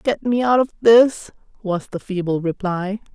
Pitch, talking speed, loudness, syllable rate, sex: 205 Hz, 170 wpm, -18 LUFS, 4.4 syllables/s, female